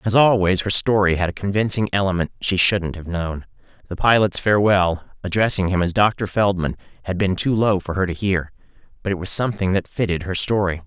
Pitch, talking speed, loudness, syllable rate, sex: 95 Hz, 200 wpm, -19 LUFS, 5.7 syllables/s, male